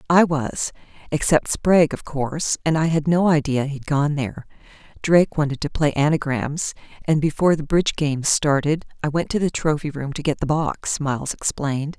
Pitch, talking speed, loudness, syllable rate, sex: 150 Hz, 185 wpm, -21 LUFS, 5.2 syllables/s, female